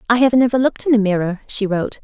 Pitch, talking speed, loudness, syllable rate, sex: 225 Hz, 265 wpm, -17 LUFS, 7.3 syllables/s, female